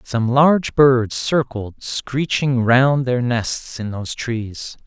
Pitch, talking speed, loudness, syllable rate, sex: 125 Hz, 135 wpm, -18 LUFS, 3.2 syllables/s, male